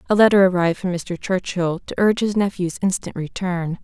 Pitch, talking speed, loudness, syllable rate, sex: 185 Hz, 190 wpm, -20 LUFS, 5.7 syllables/s, female